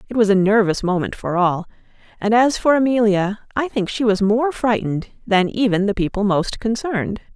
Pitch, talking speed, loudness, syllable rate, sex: 215 Hz, 190 wpm, -19 LUFS, 5.3 syllables/s, female